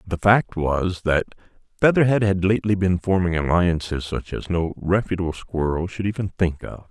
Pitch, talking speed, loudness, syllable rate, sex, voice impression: 90 Hz, 165 wpm, -21 LUFS, 5.1 syllables/s, male, very masculine, old, very thick, slightly tensed, very powerful, slightly bright, very soft, very muffled, fluent, raspy, very cool, intellectual, slightly refreshing, sincere, calm, very mature, friendly, reassuring, very unique, elegant, very wild, slightly sweet, lively, very kind, slightly modest